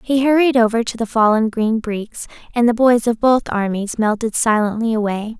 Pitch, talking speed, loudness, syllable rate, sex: 225 Hz, 190 wpm, -17 LUFS, 5.0 syllables/s, female